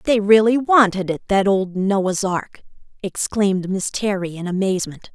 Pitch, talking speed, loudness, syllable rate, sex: 195 Hz, 150 wpm, -19 LUFS, 4.6 syllables/s, female